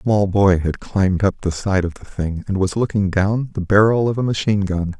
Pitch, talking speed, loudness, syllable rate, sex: 100 Hz, 255 wpm, -19 LUFS, 5.3 syllables/s, male